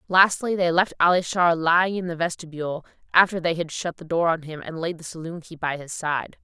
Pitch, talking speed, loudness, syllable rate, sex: 165 Hz, 235 wpm, -23 LUFS, 5.6 syllables/s, female